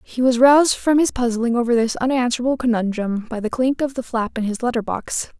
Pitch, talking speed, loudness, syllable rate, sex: 240 Hz, 225 wpm, -19 LUFS, 5.8 syllables/s, female